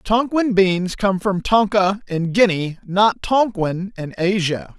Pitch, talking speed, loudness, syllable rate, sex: 195 Hz, 140 wpm, -19 LUFS, 3.5 syllables/s, male